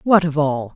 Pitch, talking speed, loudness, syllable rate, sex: 155 Hz, 235 wpm, -18 LUFS, 4.6 syllables/s, female